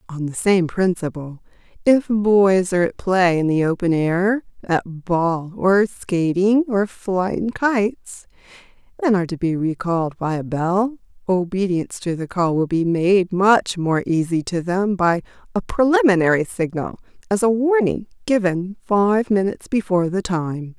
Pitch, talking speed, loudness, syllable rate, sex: 190 Hz, 145 wpm, -19 LUFS, 4.3 syllables/s, female